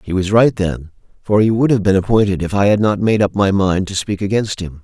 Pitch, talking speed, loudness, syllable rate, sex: 100 Hz, 275 wpm, -15 LUFS, 5.7 syllables/s, male